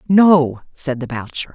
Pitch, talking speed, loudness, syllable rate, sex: 145 Hz, 155 wpm, -17 LUFS, 4.7 syllables/s, female